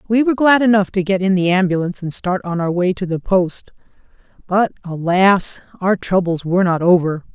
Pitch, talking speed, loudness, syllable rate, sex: 185 Hz, 195 wpm, -17 LUFS, 5.5 syllables/s, female